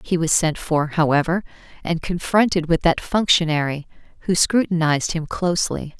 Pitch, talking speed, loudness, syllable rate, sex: 165 Hz, 140 wpm, -20 LUFS, 5.1 syllables/s, female